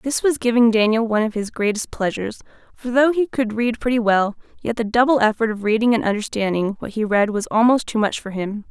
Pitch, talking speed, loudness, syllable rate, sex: 225 Hz, 225 wpm, -19 LUFS, 5.9 syllables/s, female